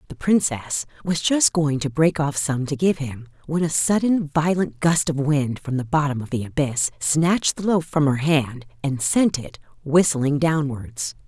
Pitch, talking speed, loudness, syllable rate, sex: 150 Hz, 190 wpm, -21 LUFS, 4.3 syllables/s, female